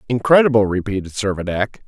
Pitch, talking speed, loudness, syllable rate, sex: 110 Hz, 95 wpm, -17 LUFS, 6.2 syllables/s, male